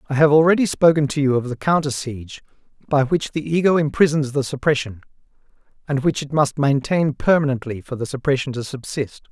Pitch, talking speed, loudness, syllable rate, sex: 140 Hz, 180 wpm, -19 LUFS, 5.8 syllables/s, male